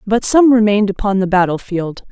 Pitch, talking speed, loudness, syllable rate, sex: 205 Hz, 170 wpm, -14 LUFS, 5.6 syllables/s, female